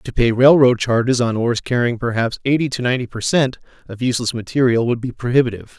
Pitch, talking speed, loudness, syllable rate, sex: 120 Hz, 195 wpm, -17 LUFS, 6.3 syllables/s, male